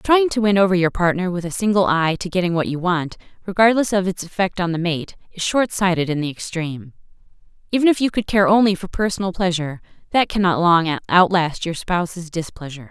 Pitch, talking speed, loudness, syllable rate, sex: 180 Hz, 205 wpm, -19 LUFS, 5.8 syllables/s, female